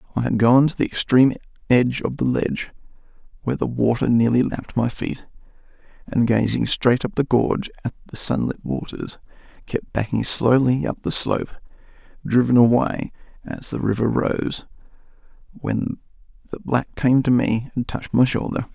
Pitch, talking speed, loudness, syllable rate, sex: 125 Hz, 155 wpm, -21 LUFS, 5.2 syllables/s, male